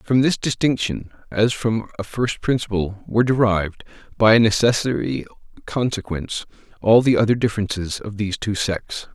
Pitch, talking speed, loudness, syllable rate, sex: 110 Hz, 145 wpm, -20 LUFS, 5.3 syllables/s, male